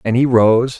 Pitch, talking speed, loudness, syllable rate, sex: 120 Hz, 225 wpm, -13 LUFS, 4.4 syllables/s, male